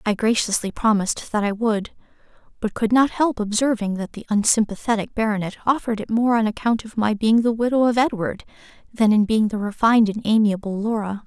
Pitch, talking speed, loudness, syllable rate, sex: 220 Hz, 185 wpm, -20 LUFS, 5.8 syllables/s, female